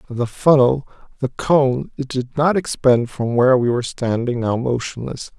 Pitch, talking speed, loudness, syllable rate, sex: 130 Hz, 155 wpm, -19 LUFS, 4.4 syllables/s, male